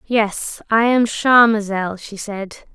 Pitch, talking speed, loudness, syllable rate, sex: 215 Hz, 130 wpm, -17 LUFS, 3.4 syllables/s, female